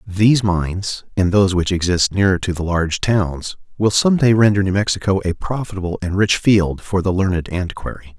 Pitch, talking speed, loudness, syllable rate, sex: 95 Hz, 190 wpm, -17 LUFS, 5.4 syllables/s, male